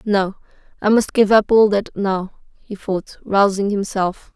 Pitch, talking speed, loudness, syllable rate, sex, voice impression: 200 Hz, 165 wpm, -18 LUFS, 3.9 syllables/s, female, feminine, adult-like, tensed, slightly muffled, raspy, nasal, slightly friendly, unique, lively, slightly strict, slightly sharp